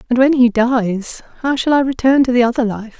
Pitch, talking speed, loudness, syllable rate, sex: 245 Hz, 240 wpm, -15 LUFS, 5.4 syllables/s, female